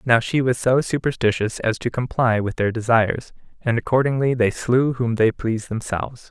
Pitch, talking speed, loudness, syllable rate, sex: 120 Hz, 180 wpm, -21 LUFS, 5.2 syllables/s, male